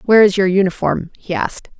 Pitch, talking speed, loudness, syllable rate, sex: 195 Hz, 165 wpm, -16 LUFS, 5.9 syllables/s, female